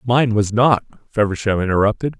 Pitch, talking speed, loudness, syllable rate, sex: 110 Hz, 135 wpm, -18 LUFS, 5.6 syllables/s, male